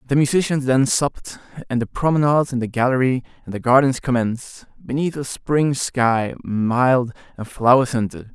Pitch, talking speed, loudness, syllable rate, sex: 130 Hz, 160 wpm, -19 LUFS, 5.0 syllables/s, male